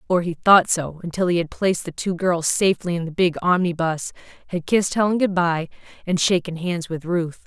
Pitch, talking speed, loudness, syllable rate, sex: 175 Hz, 210 wpm, -21 LUFS, 5.4 syllables/s, female